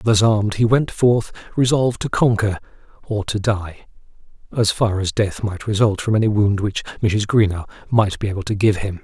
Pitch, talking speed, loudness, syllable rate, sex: 105 Hz, 185 wpm, -19 LUFS, 5.0 syllables/s, male